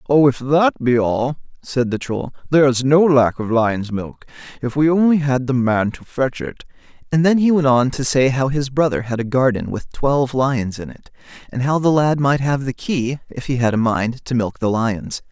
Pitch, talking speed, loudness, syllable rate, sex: 130 Hz, 225 wpm, -18 LUFS, 4.6 syllables/s, male